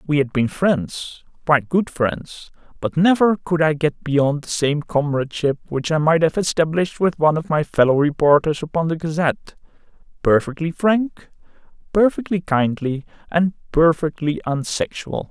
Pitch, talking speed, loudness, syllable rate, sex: 160 Hz, 140 wpm, -19 LUFS, 4.8 syllables/s, male